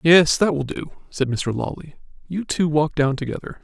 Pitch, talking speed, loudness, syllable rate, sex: 155 Hz, 200 wpm, -21 LUFS, 4.9 syllables/s, male